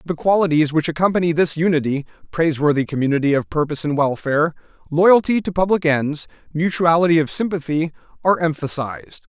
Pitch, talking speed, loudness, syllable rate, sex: 160 Hz, 135 wpm, -19 LUFS, 6.2 syllables/s, male